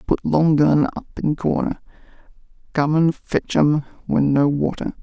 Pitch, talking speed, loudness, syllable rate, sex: 150 Hz, 155 wpm, -19 LUFS, 4.2 syllables/s, male